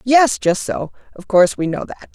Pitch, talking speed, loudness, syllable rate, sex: 210 Hz, 225 wpm, -17 LUFS, 5.0 syllables/s, female